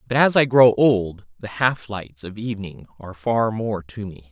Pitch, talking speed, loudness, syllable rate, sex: 110 Hz, 210 wpm, -20 LUFS, 4.6 syllables/s, male